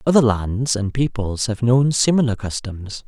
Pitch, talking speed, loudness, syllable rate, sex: 115 Hz, 155 wpm, -19 LUFS, 4.4 syllables/s, male